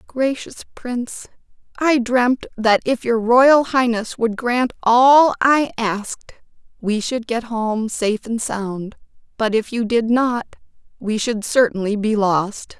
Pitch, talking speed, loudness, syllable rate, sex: 230 Hz, 145 wpm, -18 LUFS, 3.7 syllables/s, female